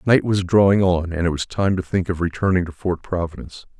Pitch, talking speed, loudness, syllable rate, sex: 90 Hz, 235 wpm, -20 LUFS, 5.9 syllables/s, male